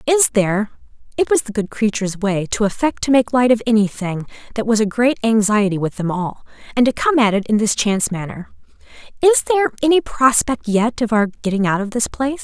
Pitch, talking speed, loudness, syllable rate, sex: 225 Hz, 205 wpm, -17 LUFS, 5.9 syllables/s, female